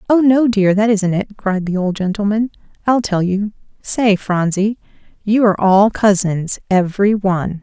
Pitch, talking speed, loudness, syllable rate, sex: 200 Hz, 155 wpm, -16 LUFS, 4.6 syllables/s, female